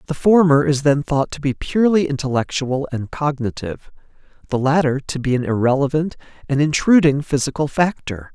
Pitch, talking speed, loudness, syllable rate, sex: 145 Hz, 150 wpm, -18 LUFS, 5.4 syllables/s, male